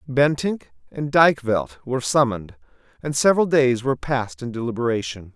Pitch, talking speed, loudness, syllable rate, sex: 125 Hz, 135 wpm, -21 LUFS, 5.5 syllables/s, male